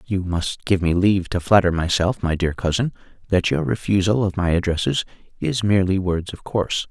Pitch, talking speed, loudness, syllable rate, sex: 95 Hz, 190 wpm, -21 LUFS, 5.5 syllables/s, male